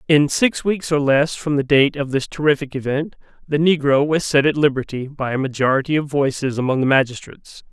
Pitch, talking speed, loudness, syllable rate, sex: 140 Hz, 200 wpm, -18 LUFS, 5.6 syllables/s, male